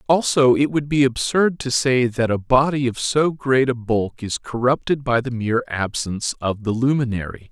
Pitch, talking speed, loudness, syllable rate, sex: 125 Hz, 190 wpm, -20 LUFS, 4.8 syllables/s, male